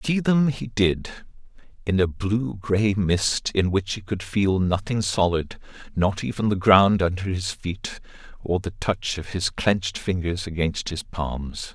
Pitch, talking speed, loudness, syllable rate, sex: 95 Hz, 170 wpm, -23 LUFS, 3.9 syllables/s, male